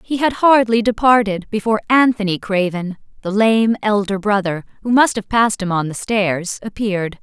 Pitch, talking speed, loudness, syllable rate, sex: 210 Hz, 165 wpm, -17 LUFS, 5.1 syllables/s, female